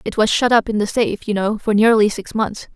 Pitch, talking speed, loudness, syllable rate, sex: 215 Hz, 285 wpm, -17 LUFS, 5.7 syllables/s, female